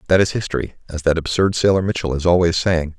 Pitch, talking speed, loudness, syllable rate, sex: 85 Hz, 220 wpm, -18 LUFS, 6.4 syllables/s, male